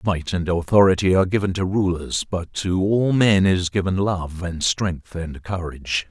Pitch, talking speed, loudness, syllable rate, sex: 90 Hz, 175 wpm, -21 LUFS, 4.5 syllables/s, male